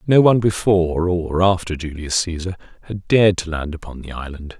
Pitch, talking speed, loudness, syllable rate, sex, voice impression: 90 Hz, 185 wpm, -19 LUFS, 5.6 syllables/s, male, masculine, middle-aged, thick, tensed, slightly dark, clear, intellectual, calm, mature, reassuring, wild, lively, slightly strict